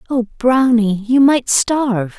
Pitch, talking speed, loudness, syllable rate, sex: 240 Hz, 140 wpm, -14 LUFS, 3.7 syllables/s, female